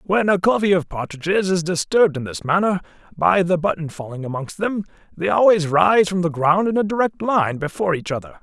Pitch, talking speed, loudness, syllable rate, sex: 175 Hz, 205 wpm, -19 LUFS, 5.6 syllables/s, male